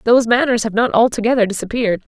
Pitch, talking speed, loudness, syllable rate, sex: 230 Hz, 170 wpm, -16 LUFS, 7.2 syllables/s, female